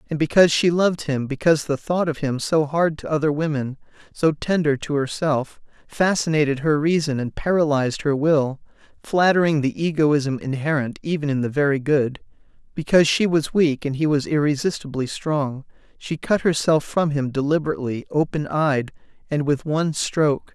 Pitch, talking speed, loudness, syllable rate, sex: 150 Hz, 160 wpm, -21 LUFS, 5.2 syllables/s, male